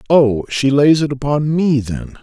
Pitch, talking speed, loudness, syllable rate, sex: 140 Hz, 160 wpm, -15 LUFS, 4.1 syllables/s, male